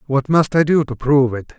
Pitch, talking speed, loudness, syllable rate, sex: 140 Hz, 265 wpm, -16 LUFS, 5.6 syllables/s, male